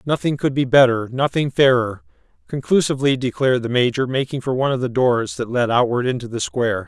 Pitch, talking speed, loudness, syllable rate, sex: 125 Hz, 185 wpm, -19 LUFS, 6.1 syllables/s, male